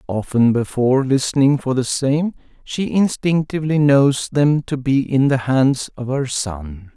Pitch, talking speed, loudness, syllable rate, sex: 135 Hz, 155 wpm, -18 LUFS, 4.2 syllables/s, male